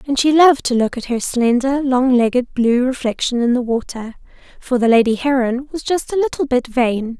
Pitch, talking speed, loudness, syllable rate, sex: 255 Hz, 210 wpm, -16 LUFS, 5.2 syllables/s, female